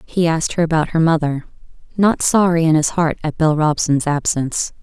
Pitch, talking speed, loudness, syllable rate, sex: 160 Hz, 185 wpm, -17 LUFS, 5.3 syllables/s, female